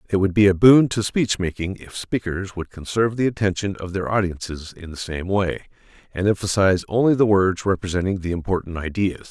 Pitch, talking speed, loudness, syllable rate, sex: 95 Hz, 195 wpm, -21 LUFS, 5.6 syllables/s, male